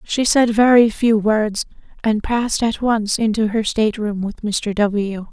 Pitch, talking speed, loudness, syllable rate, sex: 220 Hz, 180 wpm, -18 LUFS, 4.1 syllables/s, female